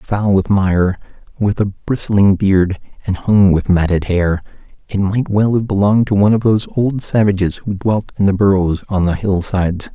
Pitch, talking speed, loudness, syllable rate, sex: 100 Hz, 185 wpm, -15 LUFS, 4.9 syllables/s, male